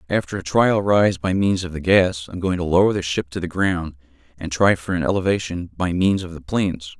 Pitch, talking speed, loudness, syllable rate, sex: 90 Hz, 240 wpm, -20 LUFS, 5.4 syllables/s, male